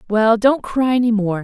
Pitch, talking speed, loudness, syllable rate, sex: 225 Hz, 210 wpm, -16 LUFS, 4.9 syllables/s, female